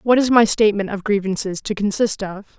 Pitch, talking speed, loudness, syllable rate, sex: 205 Hz, 210 wpm, -18 LUFS, 5.5 syllables/s, female